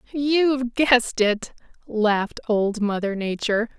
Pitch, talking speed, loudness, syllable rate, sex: 230 Hz, 110 wpm, -22 LUFS, 4.3 syllables/s, female